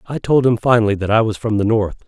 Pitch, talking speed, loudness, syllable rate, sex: 110 Hz, 290 wpm, -16 LUFS, 6.5 syllables/s, male